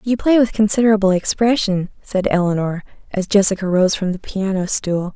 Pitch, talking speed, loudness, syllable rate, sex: 195 Hz, 165 wpm, -17 LUFS, 5.4 syllables/s, female